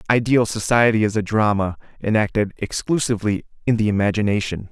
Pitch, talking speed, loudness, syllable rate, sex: 105 Hz, 125 wpm, -20 LUFS, 6.0 syllables/s, male